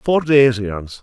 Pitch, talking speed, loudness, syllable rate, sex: 125 Hz, 235 wpm, -15 LUFS, 6.1 syllables/s, male